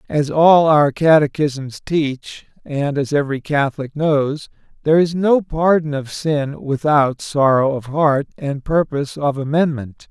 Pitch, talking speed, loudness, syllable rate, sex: 145 Hz, 140 wpm, -17 LUFS, 4.1 syllables/s, male